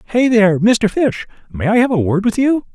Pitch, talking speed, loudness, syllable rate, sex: 215 Hz, 240 wpm, -15 LUFS, 5.5 syllables/s, male